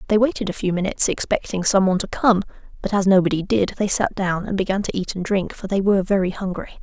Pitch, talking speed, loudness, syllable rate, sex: 195 Hz, 235 wpm, -20 LUFS, 6.5 syllables/s, female